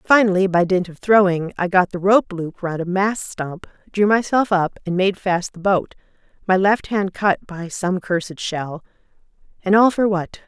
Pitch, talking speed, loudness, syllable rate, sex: 190 Hz, 195 wpm, -19 LUFS, 4.5 syllables/s, female